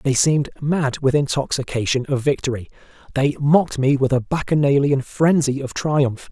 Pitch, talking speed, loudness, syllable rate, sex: 140 Hz, 150 wpm, -19 LUFS, 5.1 syllables/s, male